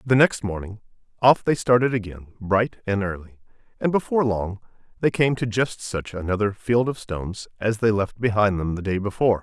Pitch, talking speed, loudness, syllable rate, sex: 110 Hz, 190 wpm, -23 LUFS, 5.3 syllables/s, male